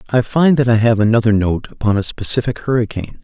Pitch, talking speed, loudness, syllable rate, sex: 115 Hz, 205 wpm, -15 LUFS, 6.3 syllables/s, male